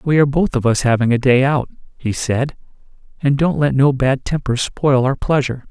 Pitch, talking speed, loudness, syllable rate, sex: 135 Hz, 210 wpm, -17 LUFS, 5.3 syllables/s, male